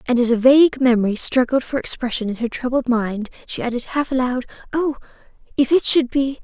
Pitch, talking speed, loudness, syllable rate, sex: 250 Hz, 195 wpm, -19 LUFS, 5.7 syllables/s, female